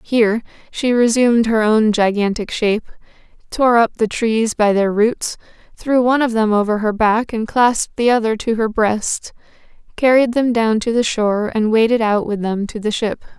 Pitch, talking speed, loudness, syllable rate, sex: 225 Hz, 190 wpm, -16 LUFS, 4.8 syllables/s, female